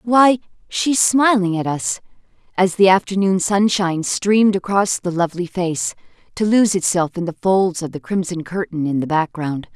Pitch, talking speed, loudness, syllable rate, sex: 185 Hz, 165 wpm, -18 LUFS, 4.8 syllables/s, female